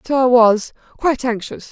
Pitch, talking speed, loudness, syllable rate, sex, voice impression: 245 Hz, 140 wpm, -16 LUFS, 5.3 syllables/s, female, very feminine, very adult-like, thin, tensed, powerful, slightly dark, hard, clear, slightly fluent, slightly raspy, cool, intellectual, very refreshing, sincere, calm, friendly, reassuring, unique, elegant, wild, slightly sweet, lively, slightly strict, slightly intense, slightly sharp, light